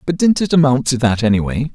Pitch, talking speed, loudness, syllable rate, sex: 135 Hz, 240 wpm, -15 LUFS, 6.2 syllables/s, male